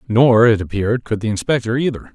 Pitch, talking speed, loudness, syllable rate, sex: 115 Hz, 195 wpm, -17 LUFS, 6.1 syllables/s, male